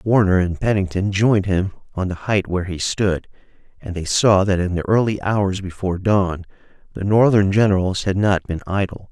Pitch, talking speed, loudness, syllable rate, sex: 95 Hz, 185 wpm, -19 LUFS, 5.2 syllables/s, male